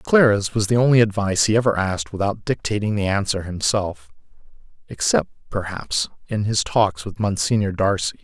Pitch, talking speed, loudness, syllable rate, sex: 100 Hz, 145 wpm, -20 LUFS, 5.3 syllables/s, male